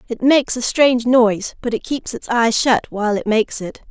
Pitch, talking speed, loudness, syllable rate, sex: 235 Hz, 230 wpm, -17 LUFS, 5.5 syllables/s, female